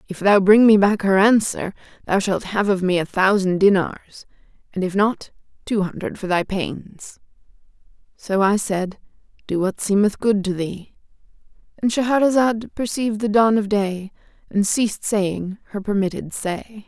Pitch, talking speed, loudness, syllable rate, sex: 200 Hz, 155 wpm, -20 LUFS, 4.5 syllables/s, female